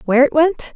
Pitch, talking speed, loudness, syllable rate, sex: 290 Hz, 240 wpm, -15 LUFS, 6.6 syllables/s, female